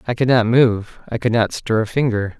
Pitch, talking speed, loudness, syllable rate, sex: 115 Hz, 250 wpm, -18 LUFS, 5.1 syllables/s, male